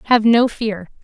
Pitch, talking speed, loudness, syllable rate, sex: 220 Hz, 175 wpm, -16 LUFS, 4.1 syllables/s, female